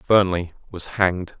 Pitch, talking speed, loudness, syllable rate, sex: 90 Hz, 130 wpm, -21 LUFS, 4.2 syllables/s, male